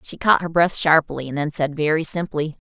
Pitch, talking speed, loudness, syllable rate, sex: 155 Hz, 225 wpm, -20 LUFS, 5.2 syllables/s, female